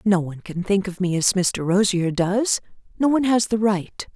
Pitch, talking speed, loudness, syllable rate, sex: 195 Hz, 215 wpm, -21 LUFS, 5.0 syllables/s, female